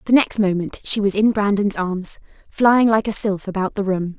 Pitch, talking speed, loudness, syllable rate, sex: 200 Hz, 215 wpm, -18 LUFS, 4.8 syllables/s, female